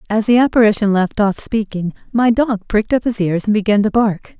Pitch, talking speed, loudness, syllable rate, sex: 215 Hz, 220 wpm, -16 LUFS, 5.6 syllables/s, female